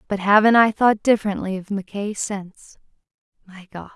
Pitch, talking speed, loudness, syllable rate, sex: 200 Hz, 150 wpm, -19 LUFS, 5.3 syllables/s, female